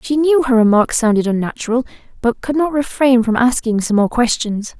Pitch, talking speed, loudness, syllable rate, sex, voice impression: 245 Hz, 190 wpm, -15 LUFS, 5.4 syllables/s, female, feminine, slightly young, slightly fluent, slightly cute, refreshing, friendly